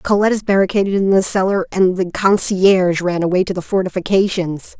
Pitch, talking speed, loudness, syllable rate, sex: 190 Hz, 175 wpm, -16 LUFS, 5.8 syllables/s, female